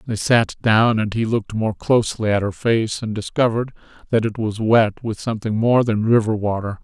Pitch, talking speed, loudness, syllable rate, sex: 110 Hz, 200 wpm, -19 LUFS, 5.4 syllables/s, male